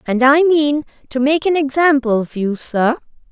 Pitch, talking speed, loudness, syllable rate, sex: 270 Hz, 180 wpm, -16 LUFS, 4.6 syllables/s, female